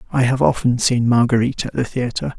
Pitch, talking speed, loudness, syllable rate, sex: 120 Hz, 200 wpm, -18 LUFS, 6.1 syllables/s, male